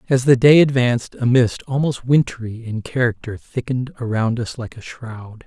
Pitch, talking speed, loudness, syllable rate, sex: 120 Hz, 175 wpm, -18 LUFS, 4.8 syllables/s, male